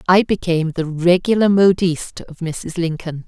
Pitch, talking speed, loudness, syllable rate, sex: 175 Hz, 145 wpm, -17 LUFS, 4.9 syllables/s, female